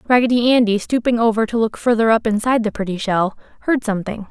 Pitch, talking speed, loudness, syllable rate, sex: 225 Hz, 195 wpm, -17 LUFS, 6.4 syllables/s, female